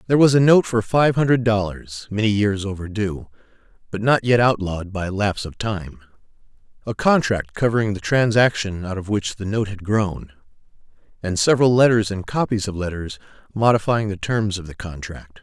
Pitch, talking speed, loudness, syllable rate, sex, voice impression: 105 Hz, 170 wpm, -20 LUFS, 5.3 syllables/s, male, masculine, adult-like, slightly thick, fluent, cool, slightly sincere, slightly reassuring